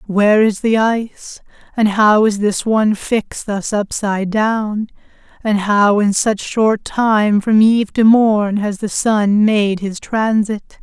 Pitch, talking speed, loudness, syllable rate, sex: 210 Hz, 160 wpm, -15 LUFS, 3.8 syllables/s, female